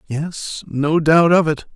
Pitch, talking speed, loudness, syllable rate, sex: 155 Hz, 170 wpm, -17 LUFS, 3.4 syllables/s, male